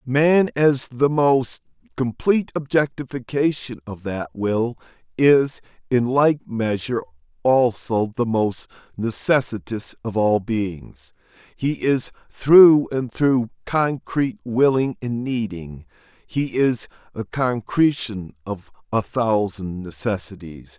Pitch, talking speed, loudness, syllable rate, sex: 120 Hz, 105 wpm, -21 LUFS, 3.6 syllables/s, male